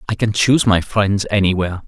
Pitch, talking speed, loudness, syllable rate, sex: 100 Hz, 190 wpm, -16 LUFS, 5.9 syllables/s, male